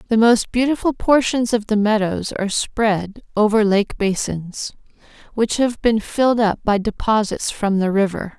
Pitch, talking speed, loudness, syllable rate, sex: 215 Hz, 155 wpm, -19 LUFS, 4.5 syllables/s, female